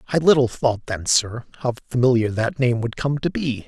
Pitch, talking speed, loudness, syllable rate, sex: 125 Hz, 210 wpm, -21 LUFS, 5.1 syllables/s, male